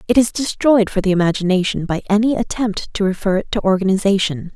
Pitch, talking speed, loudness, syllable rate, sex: 200 Hz, 185 wpm, -17 LUFS, 6.1 syllables/s, female